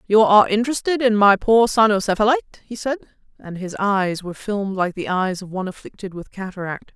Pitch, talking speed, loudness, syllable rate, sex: 205 Hz, 190 wpm, -19 LUFS, 6.2 syllables/s, female